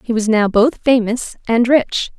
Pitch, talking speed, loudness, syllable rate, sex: 235 Hz, 190 wpm, -15 LUFS, 4.1 syllables/s, female